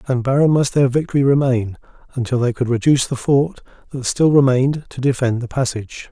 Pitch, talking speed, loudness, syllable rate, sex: 130 Hz, 185 wpm, -17 LUFS, 5.9 syllables/s, male